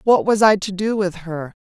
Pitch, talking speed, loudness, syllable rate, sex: 190 Hz, 255 wpm, -18 LUFS, 4.8 syllables/s, female